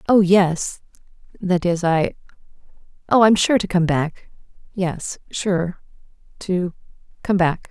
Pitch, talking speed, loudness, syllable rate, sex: 185 Hz, 70 wpm, -20 LUFS, 3.5 syllables/s, female